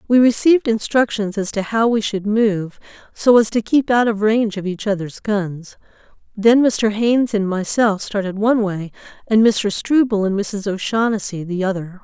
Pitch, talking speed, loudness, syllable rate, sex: 210 Hz, 180 wpm, -18 LUFS, 4.8 syllables/s, female